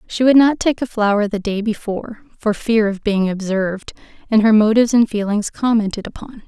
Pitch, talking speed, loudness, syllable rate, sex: 215 Hz, 195 wpm, -17 LUFS, 5.5 syllables/s, female